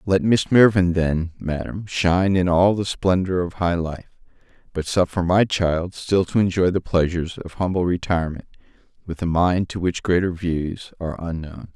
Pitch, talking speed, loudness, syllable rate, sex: 90 Hz, 175 wpm, -21 LUFS, 4.8 syllables/s, male